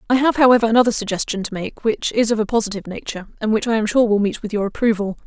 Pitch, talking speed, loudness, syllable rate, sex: 220 Hz, 260 wpm, -19 LUFS, 7.3 syllables/s, female